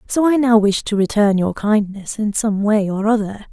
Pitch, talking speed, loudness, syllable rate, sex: 210 Hz, 220 wpm, -17 LUFS, 4.8 syllables/s, female